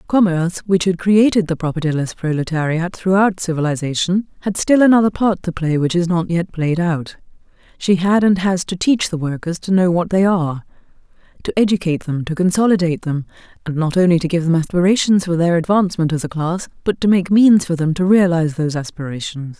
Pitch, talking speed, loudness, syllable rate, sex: 175 Hz, 195 wpm, -17 LUFS, 5.8 syllables/s, female